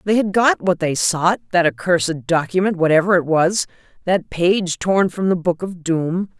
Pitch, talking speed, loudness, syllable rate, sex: 175 Hz, 190 wpm, -18 LUFS, 4.6 syllables/s, female